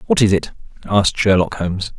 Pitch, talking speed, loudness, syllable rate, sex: 105 Hz, 180 wpm, -17 LUFS, 6.2 syllables/s, male